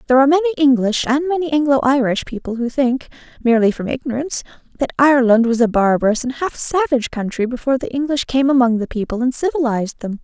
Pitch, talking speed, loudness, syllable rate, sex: 260 Hz, 195 wpm, -17 LUFS, 6.7 syllables/s, female